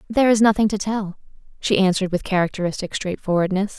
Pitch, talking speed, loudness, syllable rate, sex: 195 Hz, 160 wpm, -20 LUFS, 6.5 syllables/s, female